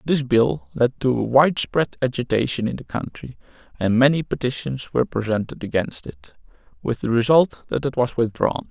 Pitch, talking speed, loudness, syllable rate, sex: 120 Hz, 165 wpm, -21 LUFS, 5.2 syllables/s, male